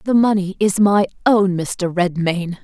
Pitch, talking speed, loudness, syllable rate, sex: 190 Hz, 160 wpm, -17 LUFS, 4.0 syllables/s, female